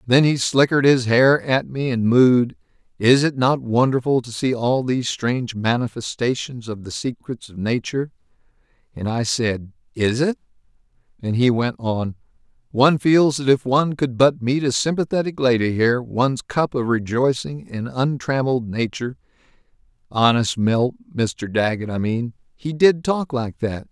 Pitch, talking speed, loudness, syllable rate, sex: 125 Hz, 160 wpm, -20 LUFS, 4.5 syllables/s, male